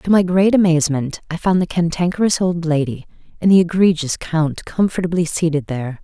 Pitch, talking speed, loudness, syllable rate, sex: 170 Hz, 170 wpm, -17 LUFS, 5.6 syllables/s, female